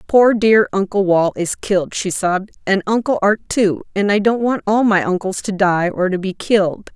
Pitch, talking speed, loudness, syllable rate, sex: 200 Hz, 215 wpm, -17 LUFS, 4.9 syllables/s, female